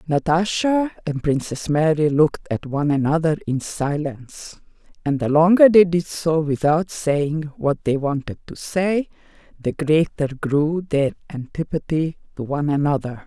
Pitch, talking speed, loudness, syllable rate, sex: 155 Hz, 140 wpm, -20 LUFS, 4.4 syllables/s, female